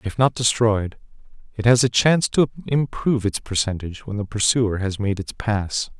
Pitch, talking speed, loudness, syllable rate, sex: 110 Hz, 180 wpm, -21 LUFS, 5.1 syllables/s, male